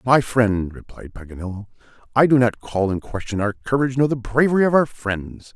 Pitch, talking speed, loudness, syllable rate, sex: 115 Hz, 195 wpm, -20 LUFS, 5.3 syllables/s, male